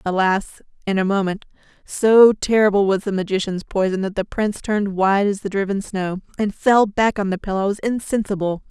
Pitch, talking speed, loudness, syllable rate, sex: 200 Hz, 180 wpm, -19 LUFS, 5.4 syllables/s, female